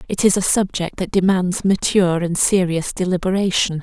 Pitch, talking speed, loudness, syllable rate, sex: 185 Hz, 155 wpm, -18 LUFS, 5.2 syllables/s, female